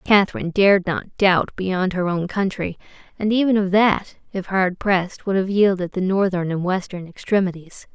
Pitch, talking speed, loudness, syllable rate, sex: 190 Hz, 175 wpm, -20 LUFS, 5.0 syllables/s, female